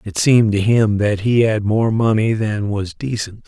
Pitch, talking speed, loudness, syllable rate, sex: 110 Hz, 205 wpm, -17 LUFS, 4.5 syllables/s, male